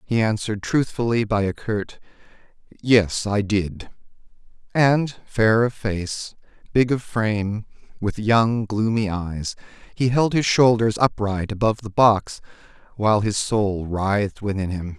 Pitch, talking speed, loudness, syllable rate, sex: 105 Hz, 135 wpm, -21 LUFS, 4.1 syllables/s, male